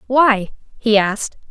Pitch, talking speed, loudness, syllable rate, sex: 225 Hz, 120 wpm, -17 LUFS, 4.2 syllables/s, female